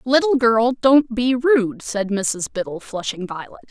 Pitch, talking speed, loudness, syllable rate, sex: 235 Hz, 160 wpm, -19 LUFS, 4.1 syllables/s, female